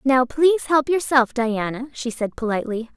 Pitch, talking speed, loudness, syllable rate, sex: 255 Hz, 160 wpm, -21 LUFS, 5.1 syllables/s, female